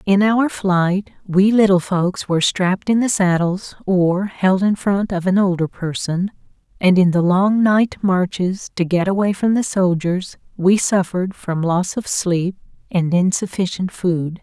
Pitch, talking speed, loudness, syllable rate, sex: 190 Hz, 165 wpm, -18 LUFS, 4.1 syllables/s, female